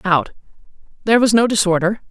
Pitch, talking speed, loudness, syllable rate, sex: 200 Hz, 140 wpm, -16 LUFS, 6.3 syllables/s, female